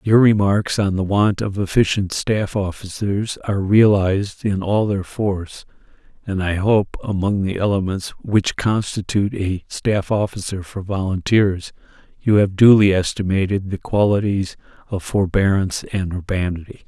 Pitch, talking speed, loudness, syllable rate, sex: 100 Hz, 135 wpm, -19 LUFS, 4.6 syllables/s, male